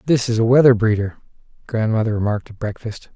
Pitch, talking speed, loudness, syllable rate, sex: 115 Hz, 170 wpm, -18 LUFS, 6.4 syllables/s, male